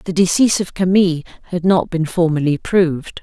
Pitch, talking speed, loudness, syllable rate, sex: 175 Hz, 165 wpm, -16 LUFS, 5.7 syllables/s, female